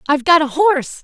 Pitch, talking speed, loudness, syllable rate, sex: 305 Hz, 230 wpm, -14 LUFS, 6.9 syllables/s, female